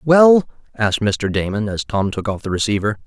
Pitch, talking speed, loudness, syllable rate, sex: 115 Hz, 195 wpm, -18 LUFS, 5.1 syllables/s, male